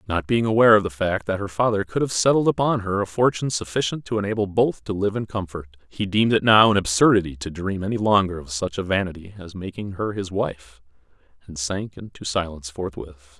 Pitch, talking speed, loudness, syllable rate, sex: 100 Hz, 215 wpm, -22 LUFS, 5.9 syllables/s, male